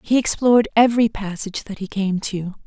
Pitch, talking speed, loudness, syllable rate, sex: 210 Hz, 180 wpm, -19 LUFS, 5.8 syllables/s, female